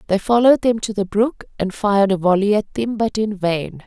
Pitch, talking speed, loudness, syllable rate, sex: 210 Hz, 235 wpm, -18 LUFS, 5.4 syllables/s, female